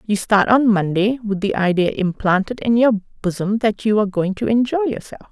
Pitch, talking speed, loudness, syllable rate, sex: 210 Hz, 205 wpm, -18 LUFS, 5.1 syllables/s, female